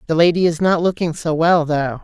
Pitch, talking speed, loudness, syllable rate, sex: 165 Hz, 235 wpm, -17 LUFS, 5.4 syllables/s, female